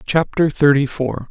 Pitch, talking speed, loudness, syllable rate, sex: 145 Hz, 140 wpm, -17 LUFS, 4.2 syllables/s, male